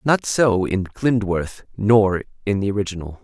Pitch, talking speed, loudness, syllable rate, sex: 105 Hz, 150 wpm, -20 LUFS, 4.2 syllables/s, male